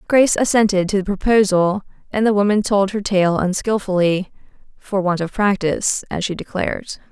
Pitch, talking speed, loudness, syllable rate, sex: 200 Hz, 160 wpm, -18 LUFS, 5.3 syllables/s, female